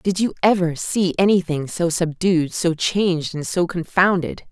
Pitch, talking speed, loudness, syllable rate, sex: 175 Hz, 160 wpm, -20 LUFS, 4.4 syllables/s, female